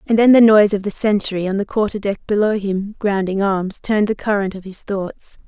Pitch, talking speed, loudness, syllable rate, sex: 205 Hz, 230 wpm, -17 LUFS, 5.4 syllables/s, female